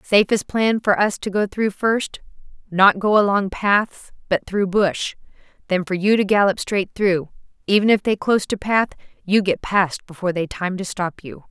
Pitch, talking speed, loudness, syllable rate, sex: 195 Hz, 195 wpm, -19 LUFS, 4.6 syllables/s, female